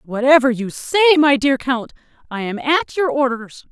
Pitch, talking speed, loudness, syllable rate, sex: 265 Hz, 180 wpm, -16 LUFS, 4.6 syllables/s, female